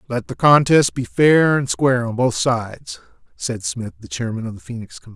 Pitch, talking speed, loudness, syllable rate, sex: 125 Hz, 210 wpm, -18 LUFS, 5.4 syllables/s, male